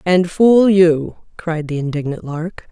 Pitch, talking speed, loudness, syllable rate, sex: 170 Hz, 155 wpm, -16 LUFS, 3.8 syllables/s, female